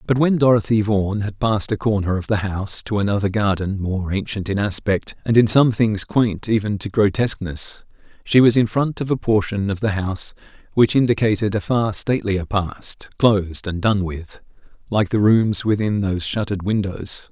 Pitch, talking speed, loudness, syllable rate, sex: 105 Hz, 180 wpm, -19 LUFS, 5.1 syllables/s, male